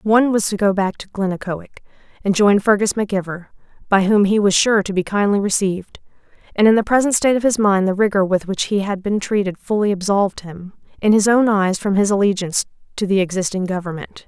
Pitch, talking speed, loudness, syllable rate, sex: 200 Hz, 215 wpm, -17 LUFS, 6.0 syllables/s, female